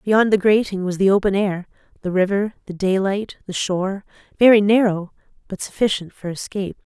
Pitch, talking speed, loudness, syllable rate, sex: 195 Hz, 165 wpm, -19 LUFS, 5.5 syllables/s, female